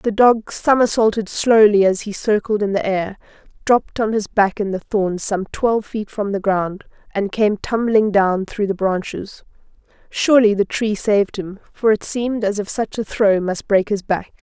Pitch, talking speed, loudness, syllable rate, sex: 205 Hz, 195 wpm, -18 LUFS, 4.7 syllables/s, female